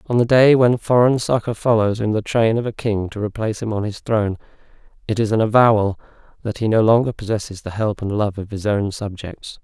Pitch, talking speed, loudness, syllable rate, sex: 110 Hz, 225 wpm, -19 LUFS, 5.8 syllables/s, male